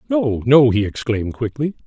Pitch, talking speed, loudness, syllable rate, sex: 125 Hz, 160 wpm, -18 LUFS, 5.2 syllables/s, male